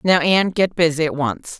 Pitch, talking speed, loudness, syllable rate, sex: 165 Hz, 225 wpm, -18 LUFS, 5.5 syllables/s, female